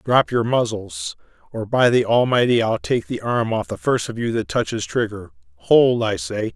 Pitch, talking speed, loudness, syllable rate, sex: 115 Hz, 200 wpm, -20 LUFS, 4.7 syllables/s, male